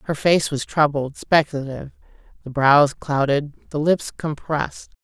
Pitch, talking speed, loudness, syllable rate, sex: 145 Hz, 130 wpm, -20 LUFS, 4.7 syllables/s, female